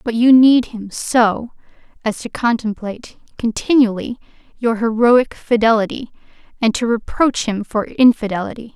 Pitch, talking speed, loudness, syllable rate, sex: 230 Hz, 125 wpm, -16 LUFS, 4.7 syllables/s, female